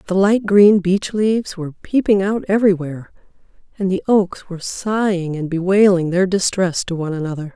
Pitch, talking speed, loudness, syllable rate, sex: 190 Hz, 165 wpm, -17 LUFS, 5.4 syllables/s, female